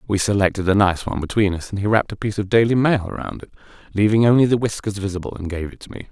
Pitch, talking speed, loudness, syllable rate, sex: 100 Hz, 265 wpm, -19 LUFS, 7.0 syllables/s, male